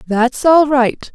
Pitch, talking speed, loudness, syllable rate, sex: 265 Hz, 155 wpm, -13 LUFS, 2.9 syllables/s, female